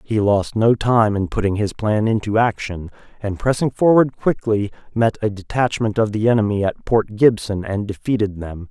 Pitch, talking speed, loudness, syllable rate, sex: 110 Hz, 180 wpm, -19 LUFS, 4.9 syllables/s, male